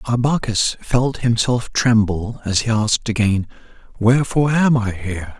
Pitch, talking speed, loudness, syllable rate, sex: 115 Hz, 135 wpm, -18 LUFS, 4.7 syllables/s, male